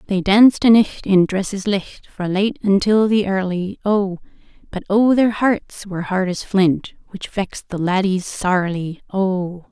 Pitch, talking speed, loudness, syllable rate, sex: 195 Hz, 165 wpm, -18 LUFS, 4.2 syllables/s, female